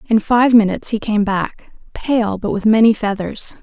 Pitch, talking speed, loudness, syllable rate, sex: 215 Hz, 180 wpm, -16 LUFS, 4.5 syllables/s, female